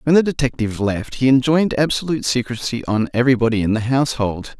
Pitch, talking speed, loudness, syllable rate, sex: 125 Hz, 170 wpm, -18 LUFS, 6.5 syllables/s, male